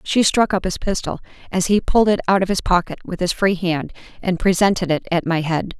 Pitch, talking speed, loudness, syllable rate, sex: 185 Hz, 240 wpm, -19 LUFS, 5.7 syllables/s, female